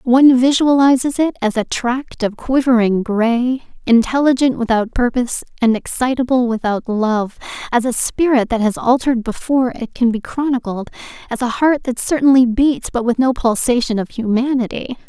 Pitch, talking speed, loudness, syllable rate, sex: 245 Hz, 155 wpm, -16 LUFS, 5.0 syllables/s, female